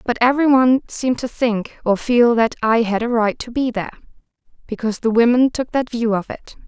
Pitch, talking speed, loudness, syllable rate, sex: 235 Hz, 215 wpm, -18 LUFS, 5.8 syllables/s, female